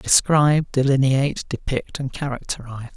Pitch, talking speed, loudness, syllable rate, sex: 135 Hz, 100 wpm, -21 LUFS, 5.3 syllables/s, male